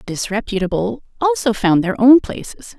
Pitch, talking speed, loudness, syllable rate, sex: 225 Hz, 150 wpm, -16 LUFS, 5.3 syllables/s, female